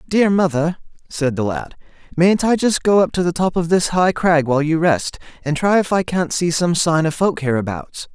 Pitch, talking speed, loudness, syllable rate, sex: 165 Hz, 230 wpm, -17 LUFS, 5.0 syllables/s, male